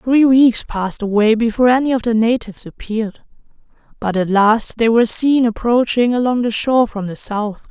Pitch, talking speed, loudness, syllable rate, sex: 230 Hz, 180 wpm, -16 LUFS, 5.4 syllables/s, female